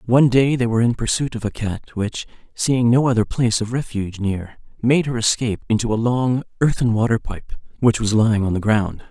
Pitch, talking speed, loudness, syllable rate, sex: 115 Hz, 210 wpm, -19 LUFS, 5.6 syllables/s, male